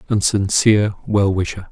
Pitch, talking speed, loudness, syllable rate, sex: 100 Hz, 140 wpm, -17 LUFS, 5.1 syllables/s, male